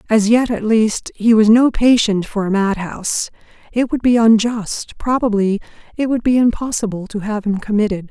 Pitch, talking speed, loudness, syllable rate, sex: 220 Hz, 185 wpm, -16 LUFS, 4.9 syllables/s, female